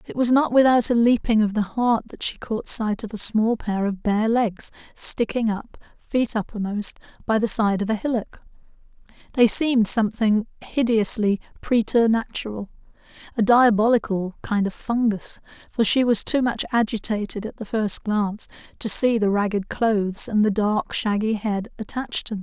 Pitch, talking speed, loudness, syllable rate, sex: 220 Hz, 165 wpm, -21 LUFS, 4.8 syllables/s, female